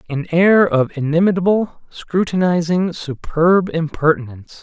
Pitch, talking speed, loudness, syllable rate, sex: 170 Hz, 90 wpm, -17 LUFS, 4.4 syllables/s, male